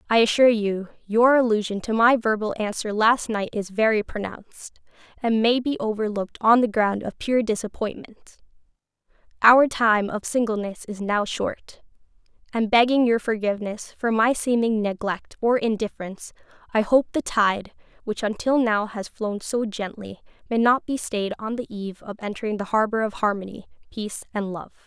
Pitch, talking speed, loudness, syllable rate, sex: 220 Hz, 165 wpm, -23 LUFS, 5.1 syllables/s, female